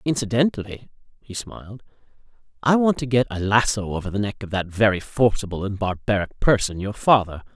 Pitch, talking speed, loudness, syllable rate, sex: 110 Hz, 165 wpm, -22 LUFS, 5.8 syllables/s, male